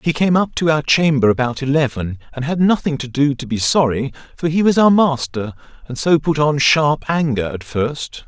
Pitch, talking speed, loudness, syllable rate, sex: 140 Hz, 210 wpm, -17 LUFS, 5.0 syllables/s, male